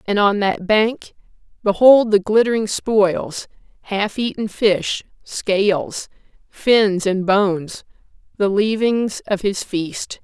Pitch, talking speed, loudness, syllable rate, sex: 205 Hz, 115 wpm, -18 LUFS, 3.2 syllables/s, female